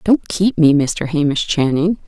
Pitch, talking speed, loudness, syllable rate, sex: 160 Hz, 175 wpm, -16 LUFS, 4.2 syllables/s, female